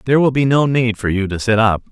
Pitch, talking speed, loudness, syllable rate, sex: 115 Hz, 315 wpm, -16 LUFS, 6.4 syllables/s, male